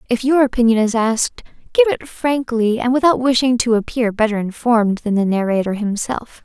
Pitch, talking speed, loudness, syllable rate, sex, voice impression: 235 Hz, 175 wpm, -17 LUFS, 5.4 syllables/s, female, feminine, slightly young, tensed, bright, clear, fluent, cute, friendly, elegant, slightly sweet, slightly sharp